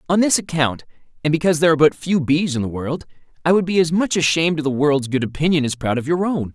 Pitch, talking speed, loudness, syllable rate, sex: 155 Hz, 275 wpm, -19 LUFS, 6.8 syllables/s, male